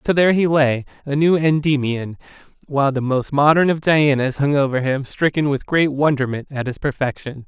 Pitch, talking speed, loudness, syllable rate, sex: 140 Hz, 185 wpm, -18 LUFS, 5.3 syllables/s, male